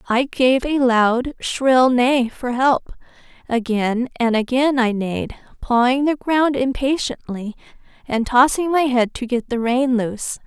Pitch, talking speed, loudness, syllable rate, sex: 250 Hz, 150 wpm, -18 LUFS, 4.1 syllables/s, female